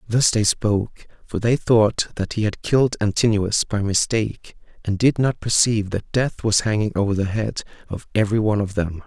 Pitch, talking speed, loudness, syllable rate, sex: 105 Hz, 190 wpm, -20 LUFS, 5.3 syllables/s, male